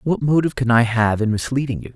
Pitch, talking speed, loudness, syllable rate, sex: 125 Hz, 245 wpm, -19 LUFS, 6.3 syllables/s, male